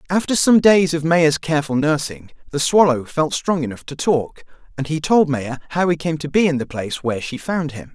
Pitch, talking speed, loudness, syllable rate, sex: 155 Hz, 225 wpm, -18 LUFS, 5.4 syllables/s, male